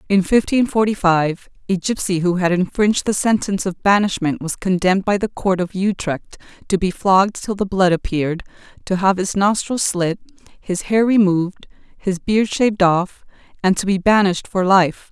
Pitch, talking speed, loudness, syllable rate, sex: 190 Hz, 180 wpm, -18 LUFS, 5.1 syllables/s, female